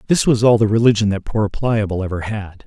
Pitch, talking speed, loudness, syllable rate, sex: 110 Hz, 225 wpm, -17 LUFS, 5.7 syllables/s, male